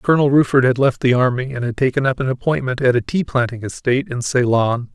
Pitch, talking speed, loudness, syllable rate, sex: 130 Hz, 230 wpm, -17 LUFS, 6.1 syllables/s, male